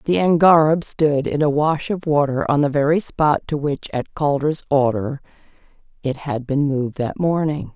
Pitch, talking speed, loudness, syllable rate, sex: 145 Hz, 180 wpm, -19 LUFS, 4.6 syllables/s, female